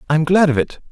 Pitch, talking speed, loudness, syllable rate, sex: 160 Hz, 330 wpm, -16 LUFS, 7.3 syllables/s, male